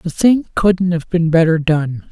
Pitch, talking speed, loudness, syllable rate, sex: 170 Hz, 200 wpm, -15 LUFS, 4.0 syllables/s, male